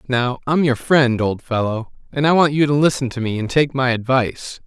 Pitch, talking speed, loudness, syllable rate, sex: 130 Hz, 230 wpm, -18 LUFS, 5.2 syllables/s, male